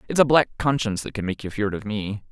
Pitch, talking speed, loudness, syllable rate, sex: 110 Hz, 285 wpm, -23 LUFS, 7.0 syllables/s, male